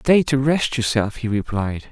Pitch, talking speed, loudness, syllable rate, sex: 120 Hz, 190 wpm, -20 LUFS, 4.3 syllables/s, male